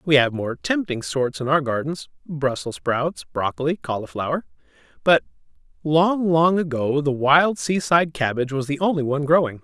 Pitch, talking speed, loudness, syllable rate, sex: 145 Hz, 150 wpm, -21 LUFS, 5.1 syllables/s, male